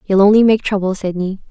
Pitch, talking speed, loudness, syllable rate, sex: 200 Hz, 200 wpm, -14 LUFS, 6.0 syllables/s, female